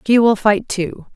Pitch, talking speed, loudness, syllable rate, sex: 215 Hz, 205 wpm, -16 LUFS, 4.2 syllables/s, female